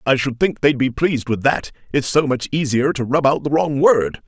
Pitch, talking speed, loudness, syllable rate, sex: 135 Hz, 250 wpm, -18 LUFS, 5.1 syllables/s, male